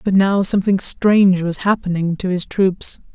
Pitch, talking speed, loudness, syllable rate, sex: 190 Hz, 170 wpm, -17 LUFS, 4.8 syllables/s, female